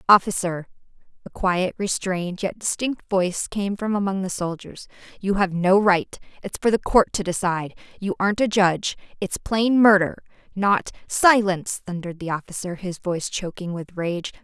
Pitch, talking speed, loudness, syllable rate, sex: 190 Hz, 150 wpm, -22 LUFS, 5.1 syllables/s, female